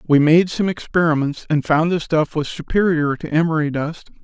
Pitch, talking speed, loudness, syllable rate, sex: 160 Hz, 185 wpm, -18 LUFS, 5.1 syllables/s, male